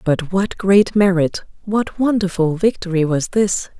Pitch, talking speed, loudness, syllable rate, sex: 190 Hz, 140 wpm, -17 LUFS, 4.1 syllables/s, female